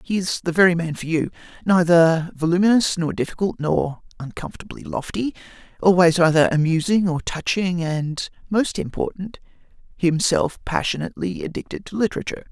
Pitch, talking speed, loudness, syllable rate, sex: 170 Hz, 120 wpm, -21 LUFS, 5.4 syllables/s, male